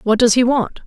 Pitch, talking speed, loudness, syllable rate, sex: 235 Hz, 275 wpm, -15 LUFS, 5.5 syllables/s, female